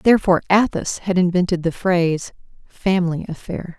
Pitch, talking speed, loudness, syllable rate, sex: 180 Hz, 125 wpm, -19 LUFS, 5.4 syllables/s, female